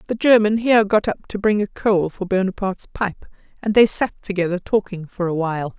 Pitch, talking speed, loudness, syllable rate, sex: 200 Hz, 205 wpm, -19 LUFS, 5.6 syllables/s, female